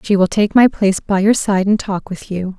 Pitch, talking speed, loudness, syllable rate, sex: 195 Hz, 280 wpm, -15 LUFS, 5.2 syllables/s, female